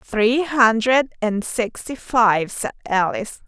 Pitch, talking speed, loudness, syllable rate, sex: 230 Hz, 120 wpm, -19 LUFS, 3.5 syllables/s, female